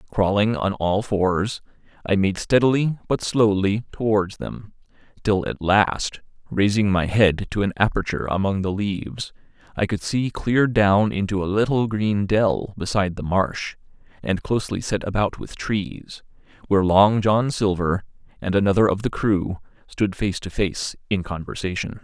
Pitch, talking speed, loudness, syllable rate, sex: 100 Hz, 155 wpm, -22 LUFS, 4.5 syllables/s, male